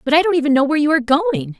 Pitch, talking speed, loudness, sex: 295 Hz, 340 wpm, -16 LUFS, female